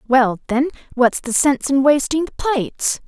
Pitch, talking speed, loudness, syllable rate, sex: 270 Hz, 175 wpm, -18 LUFS, 4.7 syllables/s, female